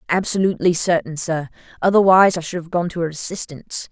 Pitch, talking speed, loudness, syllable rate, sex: 170 Hz, 170 wpm, -19 LUFS, 6.4 syllables/s, female